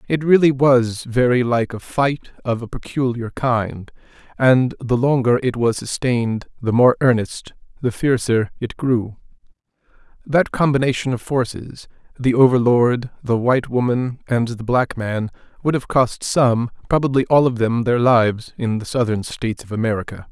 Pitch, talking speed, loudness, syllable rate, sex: 120 Hz, 140 wpm, -19 LUFS, 4.6 syllables/s, male